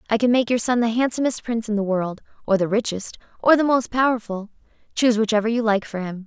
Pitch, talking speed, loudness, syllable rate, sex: 225 Hz, 230 wpm, -21 LUFS, 6.3 syllables/s, female